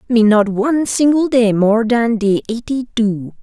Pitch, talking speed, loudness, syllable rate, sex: 230 Hz, 175 wpm, -15 LUFS, 4.2 syllables/s, female